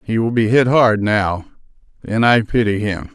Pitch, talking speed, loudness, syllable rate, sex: 110 Hz, 190 wpm, -16 LUFS, 4.5 syllables/s, male